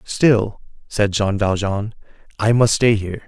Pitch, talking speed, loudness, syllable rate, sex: 105 Hz, 145 wpm, -18 LUFS, 4.0 syllables/s, male